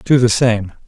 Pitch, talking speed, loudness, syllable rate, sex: 115 Hz, 205 wpm, -15 LUFS, 4.2 syllables/s, male